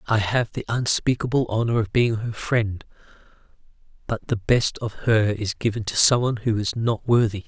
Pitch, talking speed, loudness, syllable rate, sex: 110 Hz, 175 wpm, -22 LUFS, 4.9 syllables/s, male